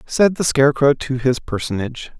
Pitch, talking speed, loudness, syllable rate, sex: 130 Hz, 165 wpm, -18 LUFS, 5.5 syllables/s, male